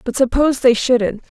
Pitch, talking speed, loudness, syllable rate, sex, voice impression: 250 Hz, 170 wpm, -16 LUFS, 5.2 syllables/s, female, feminine, adult-like, slightly relaxed, slightly weak, bright, soft, slightly muffled, intellectual, calm, friendly, reassuring, elegant, kind, modest